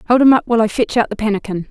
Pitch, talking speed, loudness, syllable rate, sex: 225 Hz, 315 wpm, -15 LUFS, 8.1 syllables/s, female